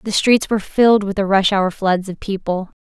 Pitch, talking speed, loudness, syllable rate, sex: 200 Hz, 235 wpm, -17 LUFS, 5.3 syllables/s, female